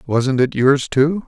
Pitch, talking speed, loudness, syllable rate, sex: 140 Hz, 190 wpm, -16 LUFS, 3.5 syllables/s, male